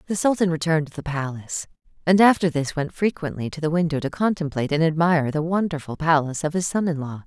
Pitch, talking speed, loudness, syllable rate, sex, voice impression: 160 Hz, 215 wpm, -22 LUFS, 6.6 syllables/s, female, feminine, adult-like, tensed, powerful, slightly hard, clear, fluent, intellectual, calm, elegant, lively, slightly sharp